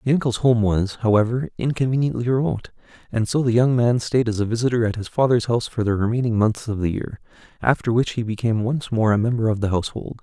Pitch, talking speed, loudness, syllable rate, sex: 115 Hz, 225 wpm, -21 LUFS, 6.4 syllables/s, male